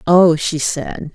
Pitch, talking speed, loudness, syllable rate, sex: 155 Hz, 160 wpm, -15 LUFS, 3.0 syllables/s, female